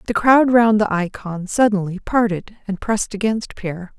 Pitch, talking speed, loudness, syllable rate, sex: 205 Hz, 165 wpm, -18 LUFS, 4.9 syllables/s, female